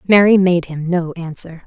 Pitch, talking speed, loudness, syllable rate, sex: 175 Hz, 180 wpm, -16 LUFS, 4.7 syllables/s, female